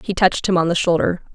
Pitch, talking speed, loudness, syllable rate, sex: 175 Hz, 270 wpm, -18 LUFS, 6.8 syllables/s, female